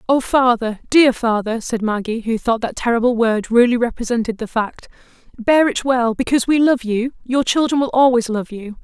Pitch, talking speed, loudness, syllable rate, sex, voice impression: 240 Hz, 190 wpm, -17 LUFS, 5.1 syllables/s, female, feminine, adult-like, tensed, powerful, bright, slightly raspy, intellectual, friendly, lively, intense